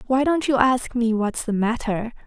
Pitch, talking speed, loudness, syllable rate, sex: 240 Hz, 210 wpm, -21 LUFS, 4.5 syllables/s, female